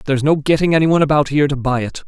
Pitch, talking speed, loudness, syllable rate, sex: 145 Hz, 290 wpm, -15 LUFS, 8.5 syllables/s, male